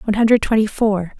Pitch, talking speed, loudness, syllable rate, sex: 210 Hz, 200 wpm, -16 LUFS, 6.4 syllables/s, female